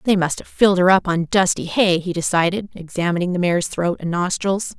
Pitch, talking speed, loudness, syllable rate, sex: 180 Hz, 215 wpm, -19 LUFS, 5.7 syllables/s, female